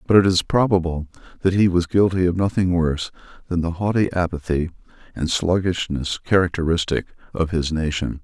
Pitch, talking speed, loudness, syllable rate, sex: 85 Hz, 155 wpm, -21 LUFS, 5.5 syllables/s, male